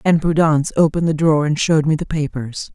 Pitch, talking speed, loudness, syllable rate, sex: 155 Hz, 220 wpm, -17 LUFS, 6.5 syllables/s, female